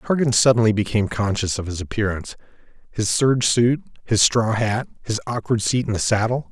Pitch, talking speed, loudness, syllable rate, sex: 110 Hz, 165 wpm, -20 LUFS, 5.8 syllables/s, male